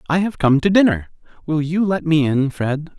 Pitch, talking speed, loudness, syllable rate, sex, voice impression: 155 Hz, 220 wpm, -18 LUFS, 5.0 syllables/s, male, masculine, adult-like, powerful, bright, clear, fluent, cool, friendly, wild, lively, slightly strict, slightly sharp